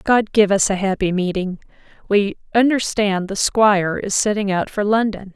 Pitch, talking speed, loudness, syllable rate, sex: 200 Hz, 170 wpm, -18 LUFS, 4.8 syllables/s, female